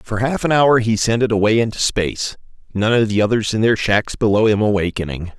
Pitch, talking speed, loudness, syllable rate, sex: 110 Hz, 225 wpm, -17 LUFS, 5.7 syllables/s, male